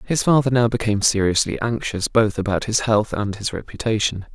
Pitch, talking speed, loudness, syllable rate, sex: 110 Hz, 180 wpm, -20 LUFS, 5.5 syllables/s, male